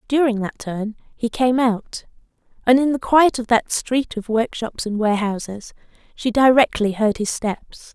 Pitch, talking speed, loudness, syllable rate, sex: 230 Hz, 165 wpm, -19 LUFS, 4.3 syllables/s, female